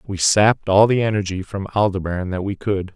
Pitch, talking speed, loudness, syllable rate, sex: 100 Hz, 205 wpm, -19 LUFS, 5.8 syllables/s, male